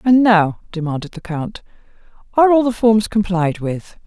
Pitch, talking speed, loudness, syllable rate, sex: 200 Hz, 160 wpm, -17 LUFS, 4.8 syllables/s, female